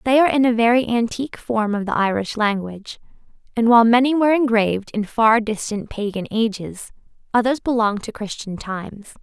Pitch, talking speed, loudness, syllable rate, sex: 225 Hz, 170 wpm, -19 LUFS, 5.6 syllables/s, female